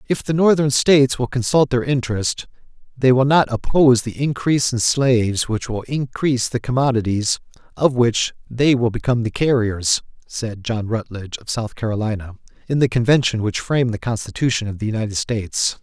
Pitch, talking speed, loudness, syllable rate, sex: 120 Hz, 170 wpm, -19 LUFS, 5.4 syllables/s, male